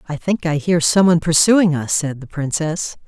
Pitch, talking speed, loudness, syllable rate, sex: 165 Hz, 195 wpm, -17 LUFS, 5.0 syllables/s, female